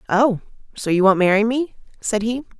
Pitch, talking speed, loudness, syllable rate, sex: 220 Hz, 185 wpm, -19 LUFS, 5.3 syllables/s, female